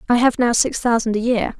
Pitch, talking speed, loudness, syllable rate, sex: 235 Hz, 265 wpm, -18 LUFS, 5.7 syllables/s, female